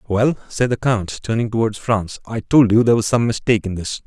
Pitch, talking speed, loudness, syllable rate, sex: 110 Hz, 235 wpm, -18 LUFS, 5.7 syllables/s, male